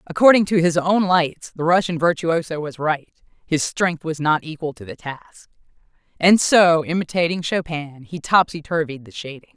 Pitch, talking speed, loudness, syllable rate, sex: 165 Hz, 170 wpm, -19 LUFS, 4.8 syllables/s, female